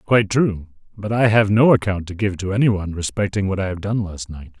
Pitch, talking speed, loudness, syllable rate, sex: 100 Hz, 235 wpm, -19 LUFS, 5.6 syllables/s, male